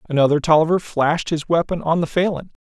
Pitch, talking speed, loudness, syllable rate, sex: 160 Hz, 185 wpm, -19 LUFS, 6.4 syllables/s, male